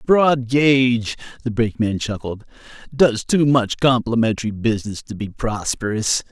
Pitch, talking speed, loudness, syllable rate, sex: 120 Hz, 125 wpm, -19 LUFS, 4.7 syllables/s, male